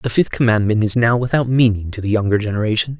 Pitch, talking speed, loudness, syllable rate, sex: 115 Hz, 220 wpm, -17 LUFS, 6.4 syllables/s, male